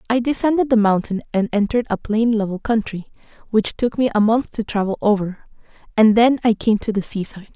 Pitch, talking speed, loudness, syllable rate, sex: 220 Hz, 205 wpm, -19 LUFS, 5.7 syllables/s, female